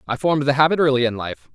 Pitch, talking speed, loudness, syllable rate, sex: 140 Hz, 270 wpm, -19 LUFS, 7.3 syllables/s, male